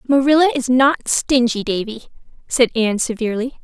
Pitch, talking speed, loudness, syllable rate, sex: 245 Hz, 130 wpm, -17 LUFS, 5.4 syllables/s, female